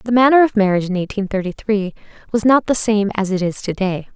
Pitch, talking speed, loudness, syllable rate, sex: 205 Hz, 245 wpm, -17 LUFS, 6.2 syllables/s, female